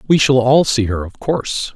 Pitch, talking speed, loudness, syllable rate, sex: 125 Hz, 240 wpm, -15 LUFS, 5.1 syllables/s, male